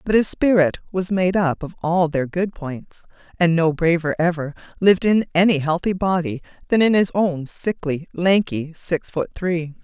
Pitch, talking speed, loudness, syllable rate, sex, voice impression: 170 Hz, 175 wpm, -20 LUFS, 4.5 syllables/s, female, feminine, slightly gender-neutral, adult-like, slightly middle-aged, thin, slightly tensed, slightly weak, bright, slightly soft, clear, fluent, slightly cute, slightly cool, intellectual, slightly refreshing, slightly sincere, slightly calm, slightly friendly, reassuring, unique, elegant, slightly sweet, slightly lively, kind